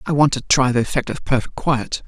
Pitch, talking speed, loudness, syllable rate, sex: 130 Hz, 260 wpm, -19 LUFS, 5.7 syllables/s, male